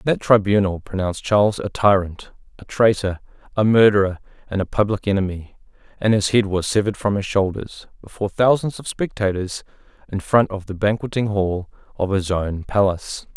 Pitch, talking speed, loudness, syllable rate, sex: 100 Hz, 160 wpm, -20 LUFS, 5.4 syllables/s, male